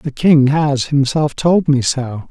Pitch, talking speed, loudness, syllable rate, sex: 140 Hz, 180 wpm, -14 LUFS, 3.5 syllables/s, male